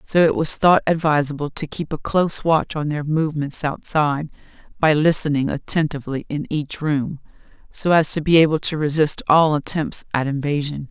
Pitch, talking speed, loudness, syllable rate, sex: 150 Hz, 170 wpm, -19 LUFS, 5.2 syllables/s, female